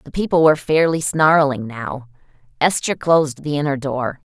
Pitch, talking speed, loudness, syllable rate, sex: 145 Hz, 155 wpm, -18 LUFS, 5.0 syllables/s, female